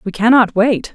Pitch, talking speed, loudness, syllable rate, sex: 220 Hz, 190 wpm, -13 LUFS, 4.7 syllables/s, female